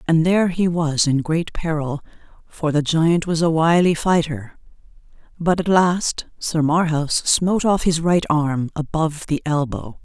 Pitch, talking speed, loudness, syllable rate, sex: 160 Hz, 160 wpm, -19 LUFS, 4.2 syllables/s, female